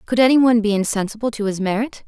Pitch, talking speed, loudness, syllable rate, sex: 220 Hz, 200 wpm, -18 LUFS, 6.7 syllables/s, female